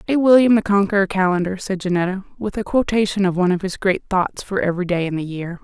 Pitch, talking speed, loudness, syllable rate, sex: 190 Hz, 235 wpm, -19 LUFS, 6.4 syllables/s, female